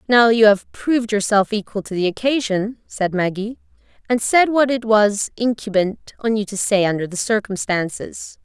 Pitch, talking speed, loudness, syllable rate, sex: 215 Hz, 170 wpm, -19 LUFS, 4.8 syllables/s, female